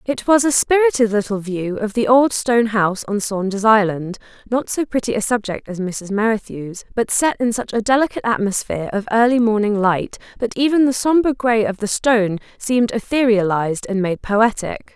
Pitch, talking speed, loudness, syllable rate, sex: 220 Hz, 185 wpm, -18 LUFS, 5.3 syllables/s, female